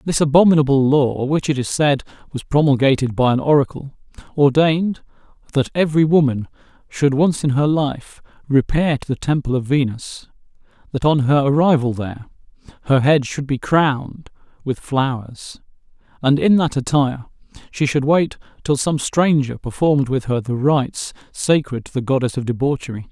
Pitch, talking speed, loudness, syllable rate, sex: 140 Hz, 155 wpm, -18 LUFS, 5.1 syllables/s, male